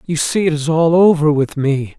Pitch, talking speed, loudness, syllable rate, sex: 155 Hz, 240 wpm, -15 LUFS, 4.8 syllables/s, male